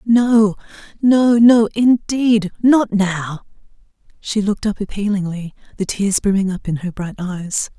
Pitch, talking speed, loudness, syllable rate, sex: 205 Hz, 140 wpm, -17 LUFS, 4.0 syllables/s, female